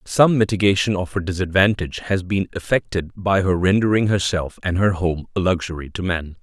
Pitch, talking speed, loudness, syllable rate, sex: 95 Hz, 175 wpm, -20 LUFS, 5.5 syllables/s, male